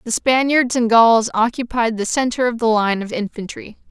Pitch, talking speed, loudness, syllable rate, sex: 230 Hz, 185 wpm, -17 LUFS, 4.9 syllables/s, female